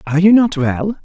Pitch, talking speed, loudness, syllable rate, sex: 180 Hz, 230 wpm, -13 LUFS, 5.6 syllables/s, male